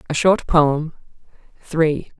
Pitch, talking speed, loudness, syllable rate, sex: 155 Hz, 110 wpm, -18 LUFS, 3.1 syllables/s, female